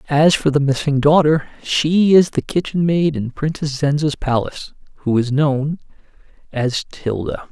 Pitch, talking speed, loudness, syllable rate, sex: 145 Hz, 150 wpm, -17 LUFS, 4.4 syllables/s, male